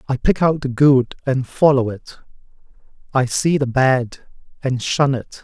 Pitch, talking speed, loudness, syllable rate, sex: 130 Hz, 165 wpm, -18 LUFS, 4.2 syllables/s, male